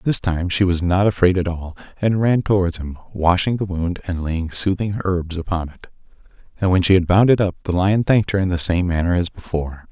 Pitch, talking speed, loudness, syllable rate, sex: 90 Hz, 230 wpm, -19 LUFS, 5.5 syllables/s, male